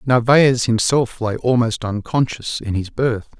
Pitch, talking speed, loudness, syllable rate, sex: 120 Hz, 140 wpm, -18 LUFS, 4.1 syllables/s, male